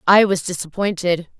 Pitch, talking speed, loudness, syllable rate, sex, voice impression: 185 Hz, 130 wpm, -19 LUFS, 5.0 syllables/s, female, very feminine, slightly adult-like, thin, tensed, slightly powerful, very bright, slightly soft, very clear, very fluent, cute, slightly cool, very intellectual, refreshing, sincere, very calm, friendly, reassuring, unique, slightly elegant, sweet, lively, kind, slightly sharp, modest, light